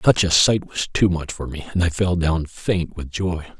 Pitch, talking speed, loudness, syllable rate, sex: 85 Hz, 250 wpm, -21 LUFS, 4.6 syllables/s, male